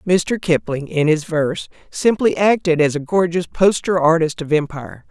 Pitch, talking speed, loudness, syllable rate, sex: 165 Hz, 165 wpm, -17 LUFS, 4.9 syllables/s, female